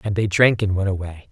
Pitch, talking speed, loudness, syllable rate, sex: 100 Hz, 275 wpm, -19 LUFS, 5.8 syllables/s, male